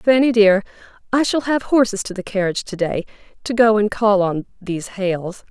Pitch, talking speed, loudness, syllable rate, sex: 210 Hz, 195 wpm, -18 LUFS, 5.2 syllables/s, female